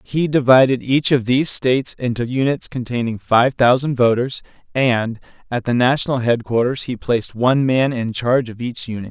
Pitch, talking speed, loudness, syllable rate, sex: 125 Hz, 170 wpm, -18 LUFS, 5.2 syllables/s, male